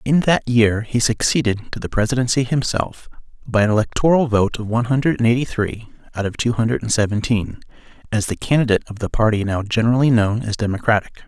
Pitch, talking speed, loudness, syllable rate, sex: 115 Hz, 180 wpm, -19 LUFS, 5.9 syllables/s, male